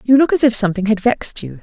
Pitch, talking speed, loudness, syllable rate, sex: 225 Hz, 295 wpm, -15 LUFS, 7.2 syllables/s, female